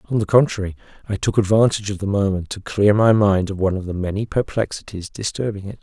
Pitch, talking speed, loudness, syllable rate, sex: 100 Hz, 215 wpm, -20 LUFS, 6.3 syllables/s, male